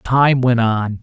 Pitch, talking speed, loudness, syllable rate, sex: 120 Hz, 175 wpm, -15 LUFS, 3.0 syllables/s, male